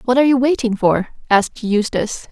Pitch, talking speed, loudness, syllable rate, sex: 235 Hz, 180 wpm, -17 LUFS, 5.9 syllables/s, female